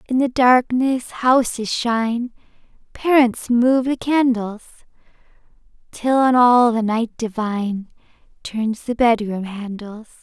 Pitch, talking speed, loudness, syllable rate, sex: 235 Hz, 110 wpm, -18 LUFS, 3.8 syllables/s, female